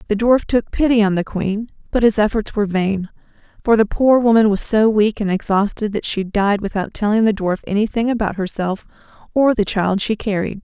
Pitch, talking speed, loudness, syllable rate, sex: 210 Hz, 205 wpm, -17 LUFS, 5.4 syllables/s, female